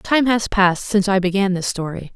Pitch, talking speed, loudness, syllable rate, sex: 195 Hz, 220 wpm, -18 LUFS, 5.7 syllables/s, female